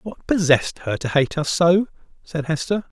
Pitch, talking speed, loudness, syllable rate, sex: 165 Hz, 180 wpm, -20 LUFS, 4.8 syllables/s, male